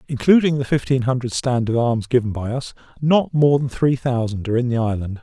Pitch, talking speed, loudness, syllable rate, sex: 125 Hz, 220 wpm, -19 LUFS, 5.6 syllables/s, male